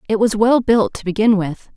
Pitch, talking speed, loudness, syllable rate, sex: 210 Hz, 240 wpm, -16 LUFS, 5.2 syllables/s, female